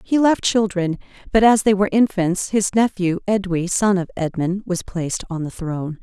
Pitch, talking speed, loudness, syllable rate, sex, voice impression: 190 Hz, 190 wpm, -19 LUFS, 5.0 syllables/s, female, feminine, middle-aged, tensed, powerful, clear, fluent, intellectual, friendly, reassuring, elegant, lively